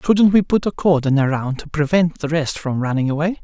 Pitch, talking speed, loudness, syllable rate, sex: 160 Hz, 225 wpm, -18 LUFS, 5.1 syllables/s, male